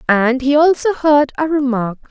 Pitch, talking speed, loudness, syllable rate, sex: 275 Hz, 170 wpm, -15 LUFS, 4.5 syllables/s, female